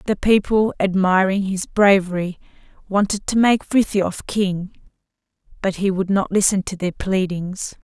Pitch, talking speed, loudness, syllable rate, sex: 195 Hz, 135 wpm, -19 LUFS, 4.3 syllables/s, female